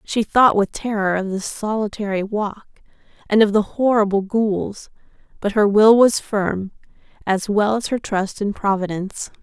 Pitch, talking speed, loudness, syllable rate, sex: 205 Hz, 160 wpm, -19 LUFS, 4.5 syllables/s, female